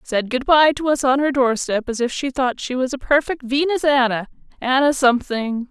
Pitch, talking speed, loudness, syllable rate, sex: 260 Hz, 200 wpm, -19 LUFS, 5.1 syllables/s, female